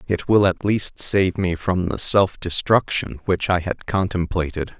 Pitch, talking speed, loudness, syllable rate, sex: 95 Hz, 175 wpm, -20 LUFS, 4.2 syllables/s, male